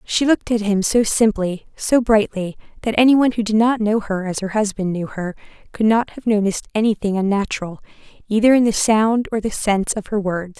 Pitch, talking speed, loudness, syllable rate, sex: 210 Hz, 205 wpm, -18 LUFS, 5.6 syllables/s, female